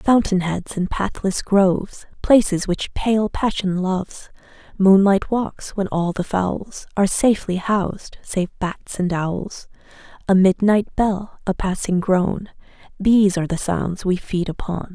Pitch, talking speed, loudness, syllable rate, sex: 195 Hz, 145 wpm, -20 LUFS, 4.0 syllables/s, female